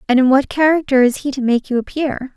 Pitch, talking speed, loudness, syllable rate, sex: 265 Hz, 255 wpm, -16 LUFS, 5.9 syllables/s, female